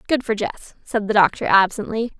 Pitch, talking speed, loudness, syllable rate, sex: 215 Hz, 190 wpm, -19 LUFS, 5.2 syllables/s, female